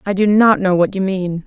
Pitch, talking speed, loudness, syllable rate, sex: 195 Hz, 285 wpm, -15 LUFS, 5.2 syllables/s, female